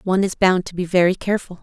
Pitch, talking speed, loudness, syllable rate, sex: 185 Hz, 260 wpm, -19 LUFS, 7.2 syllables/s, female